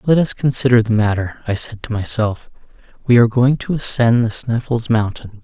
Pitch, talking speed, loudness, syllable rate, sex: 115 Hz, 190 wpm, -17 LUFS, 5.3 syllables/s, male